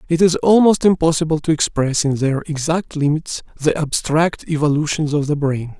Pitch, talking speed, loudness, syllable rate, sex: 155 Hz, 165 wpm, -17 LUFS, 5.1 syllables/s, male